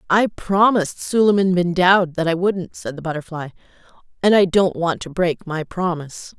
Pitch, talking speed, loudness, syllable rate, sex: 180 Hz, 180 wpm, -19 LUFS, 5.0 syllables/s, female